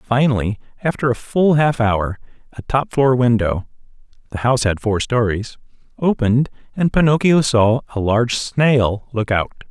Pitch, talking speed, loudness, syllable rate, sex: 120 Hz, 150 wpm, -17 LUFS, 4.2 syllables/s, male